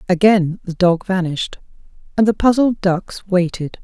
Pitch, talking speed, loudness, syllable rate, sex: 185 Hz, 140 wpm, -17 LUFS, 4.7 syllables/s, female